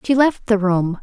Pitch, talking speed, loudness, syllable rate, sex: 215 Hz, 235 wpm, -17 LUFS, 4.3 syllables/s, female